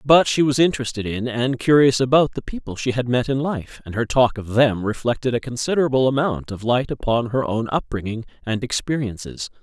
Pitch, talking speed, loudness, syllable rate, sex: 125 Hz, 200 wpm, -21 LUFS, 5.6 syllables/s, male